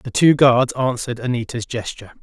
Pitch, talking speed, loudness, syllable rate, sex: 125 Hz, 160 wpm, -18 LUFS, 5.7 syllables/s, male